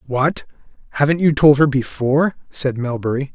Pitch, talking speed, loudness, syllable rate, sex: 140 Hz, 145 wpm, -17 LUFS, 5.0 syllables/s, male